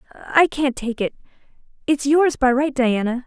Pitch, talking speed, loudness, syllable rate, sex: 265 Hz, 145 wpm, -19 LUFS, 5.5 syllables/s, female